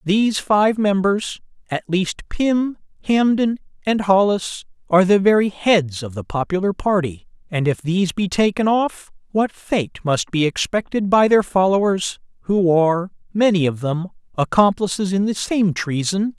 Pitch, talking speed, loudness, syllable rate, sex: 195 Hz, 150 wpm, -19 LUFS, 4.5 syllables/s, male